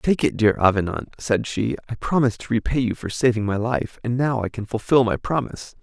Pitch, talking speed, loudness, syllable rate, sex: 115 Hz, 225 wpm, -22 LUFS, 5.7 syllables/s, male